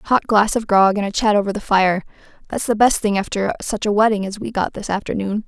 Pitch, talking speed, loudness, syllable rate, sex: 205 Hz, 250 wpm, -18 LUFS, 5.8 syllables/s, female